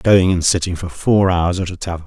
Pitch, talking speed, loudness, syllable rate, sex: 90 Hz, 260 wpm, -17 LUFS, 5.4 syllables/s, male